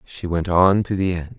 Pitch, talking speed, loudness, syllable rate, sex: 90 Hz, 260 wpm, -19 LUFS, 4.7 syllables/s, male